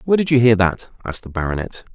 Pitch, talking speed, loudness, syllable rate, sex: 110 Hz, 245 wpm, -18 LUFS, 7.5 syllables/s, male